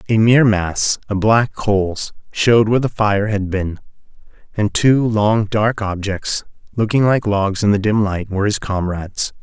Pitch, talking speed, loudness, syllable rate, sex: 105 Hz, 170 wpm, -17 LUFS, 4.6 syllables/s, male